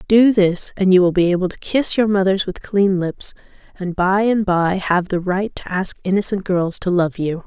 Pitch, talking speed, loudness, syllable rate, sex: 190 Hz, 225 wpm, -18 LUFS, 4.7 syllables/s, female